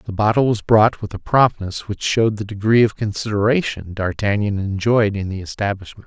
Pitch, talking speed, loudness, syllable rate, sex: 105 Hz, 180 wpm, -19 LUFS, 5.3 syllables/s, male